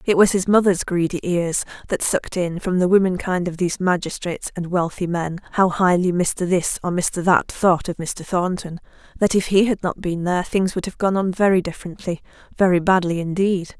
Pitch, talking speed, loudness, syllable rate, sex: 180 Hz, 200 wpm, -20 LUFS, 5.4 syllables/s, female